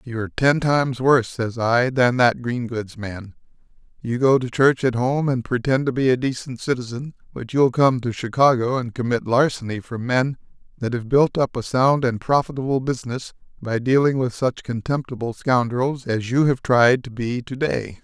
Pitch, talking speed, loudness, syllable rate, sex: 125 Hz, 195 wpm, -21 LUFS, 4.9 syllables/s, male